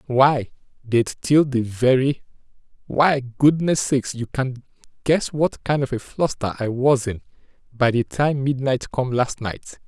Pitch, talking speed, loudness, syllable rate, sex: 130 Hz, 160 wpm, -21 LUFS, 4.1 syllables/s, male